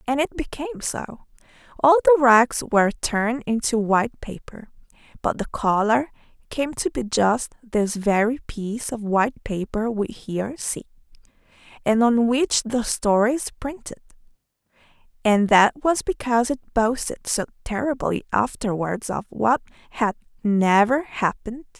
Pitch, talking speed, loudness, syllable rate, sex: 235 Hz, 140 wpm, -22 LUFS, 4.6 syllables/s, female